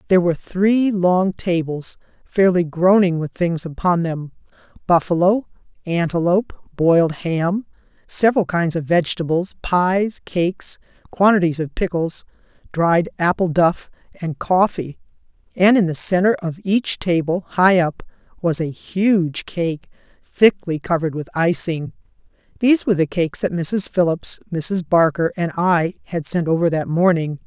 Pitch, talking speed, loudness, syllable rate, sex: 175 Hz, 135 wpm, -19 LUFS, 4.4 syllables/s, female